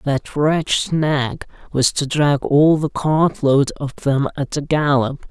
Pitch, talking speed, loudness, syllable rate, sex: 145 Hz, 160 wpm, -18 LUFS, 3.6 syllables/s, male